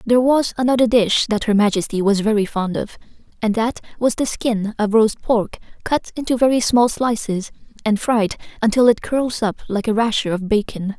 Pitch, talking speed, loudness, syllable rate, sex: 225 Hz, 190 wpm, -18 LUFS, 5.1 syllables/s, female